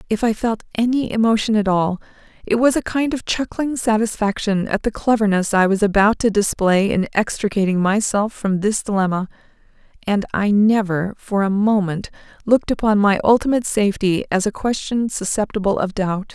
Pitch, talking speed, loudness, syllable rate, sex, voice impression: 210 Hz, 165 wpm, -18 LUFS, 5.3 syllables/s, female, very feminine, very gender-neutral, slightly young, slightly adult-like, very thin, slightly tensed, slightly powerful, slightly dark, slightly soft, clear, fluent, cute, very intellectual, refreshing, very sincere, very calm, friendly, reassuring, unique, elegant, slightly wild, sweet, lively, very kind